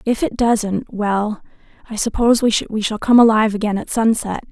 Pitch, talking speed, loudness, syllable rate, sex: 220 Hz, 175 wpm, -17 LUFS, 5.3 syllables/s, female